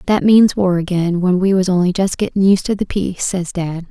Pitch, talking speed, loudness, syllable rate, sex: 185 Hz, 245 wpm, -15 LUFS, 5.4 syllables/s, female